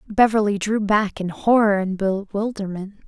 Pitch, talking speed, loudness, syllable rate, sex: 205 Hz, 135 wpm, -20 LUFS, 4.8 syllables/s, female